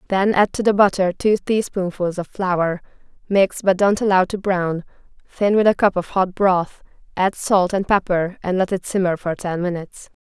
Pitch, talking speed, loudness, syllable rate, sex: 190 Hz, 190 wpm, -19 LUFS, 4.7 syllables/s, female